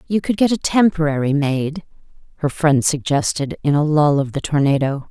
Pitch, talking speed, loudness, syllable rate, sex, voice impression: 150 Hz, 175 wpm, -18 LUFS, 5.1 syllables/s, female, feminine, middle-aged, relaxed, slightly dark, clear, slightly nasal, intellectual, calm, slightly friendly, reassuring, elegant, slightly sharp, modest